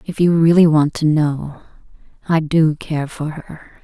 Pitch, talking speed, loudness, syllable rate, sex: 155 Hz, 170 wpm, -16 LUFS, 4.0 syllables/s, female